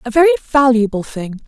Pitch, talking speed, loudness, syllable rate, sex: 250 Hz, 165 wpm, -14 LUFS, 5.8 syllables/s, female